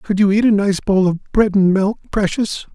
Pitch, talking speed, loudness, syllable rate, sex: 200 Hz, 240 wpm, -16 LUFS, 4.9 syllables/s, male